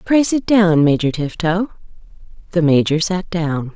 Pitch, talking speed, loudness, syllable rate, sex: 175 Hz, 145 wpm, -17 LUFS, 4.2 syllables/s, female